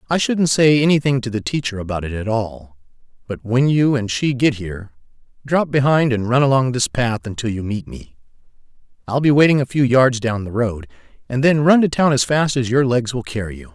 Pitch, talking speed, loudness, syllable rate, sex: 125 Hz, 215 wpm, -17 LUFS, 5.5 syllables/s, male